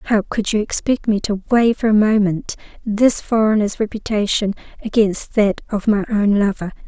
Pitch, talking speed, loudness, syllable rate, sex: 210 Hz, 165 wpm, -18 LUFS, 4.7 syllables/s, female